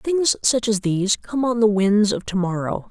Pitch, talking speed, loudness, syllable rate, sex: 215 Hz, 230 wpm, -20 LUFS, 4.7 syllables/s, female